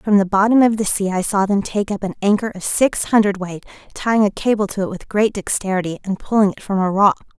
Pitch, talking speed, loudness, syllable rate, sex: 200 Hz, 245 wpm, -18 LUFS, 5.8 syllables/s, female